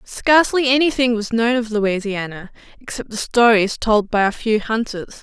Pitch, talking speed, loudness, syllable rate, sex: 225 Hz, 160 wpm, -17 LUFS, 4.7 syllables/s, female